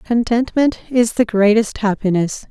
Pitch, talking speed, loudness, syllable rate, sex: 220 Hz, 120 wpm, -16 LUFS, 4.3 syllables/s, female